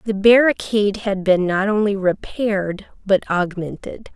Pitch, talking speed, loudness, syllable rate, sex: 200 Hz, 130 wpm, -18 LUFS, 4.6 syllables/s, female